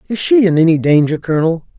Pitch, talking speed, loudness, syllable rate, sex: 170 Hz, 200 wpm, -13 LUFS, 6.6 syllables/s, male